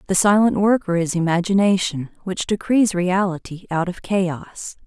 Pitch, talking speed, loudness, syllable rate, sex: 185 Hz, 135 wpm, -19 LUFS, 4.5 syllables/s, female